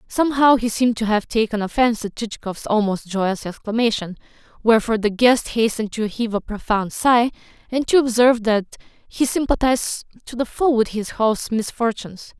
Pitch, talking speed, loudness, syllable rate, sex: 225 Hz, 165 wpm, -20 LUFS, 5.6 syllables/s, female